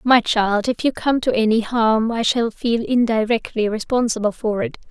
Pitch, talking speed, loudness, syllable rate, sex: 225 Hz, 185 wpm, -19 LUFS, 4.5 syllables/s, female